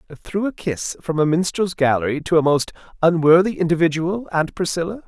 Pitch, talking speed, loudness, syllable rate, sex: 170 Hz, 155 wpm, -19 LUFS, 5.4 syllables/s, male